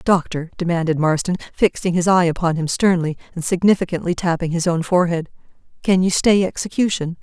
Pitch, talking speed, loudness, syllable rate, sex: 175 Hz, 160 wpm, -19 LUFS, 5.8 syllables/s, female